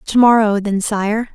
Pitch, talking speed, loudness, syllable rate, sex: 215 Hz, 135 wpm, -15 LUFS, 4.2 syllables/s, female